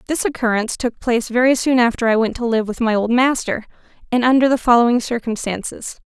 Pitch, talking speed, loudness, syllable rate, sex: 240 Hz, 200 wpm, -17 LUFS, 6.2 syllables/s, female